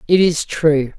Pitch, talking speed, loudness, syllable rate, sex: 160 Hz, 185 wpm, -16 LUFS, 3.8 syllables/s, female